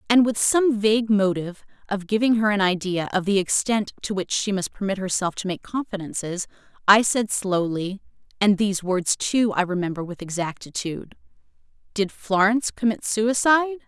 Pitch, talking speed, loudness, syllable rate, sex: 200 Hz, 150 wpm, -22 LUFS, 5.3 syllables/s, female